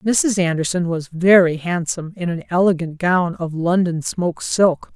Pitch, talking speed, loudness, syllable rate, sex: 175 Hz, 155 wpm, -18 LUFS, 4.6 syllables/s, female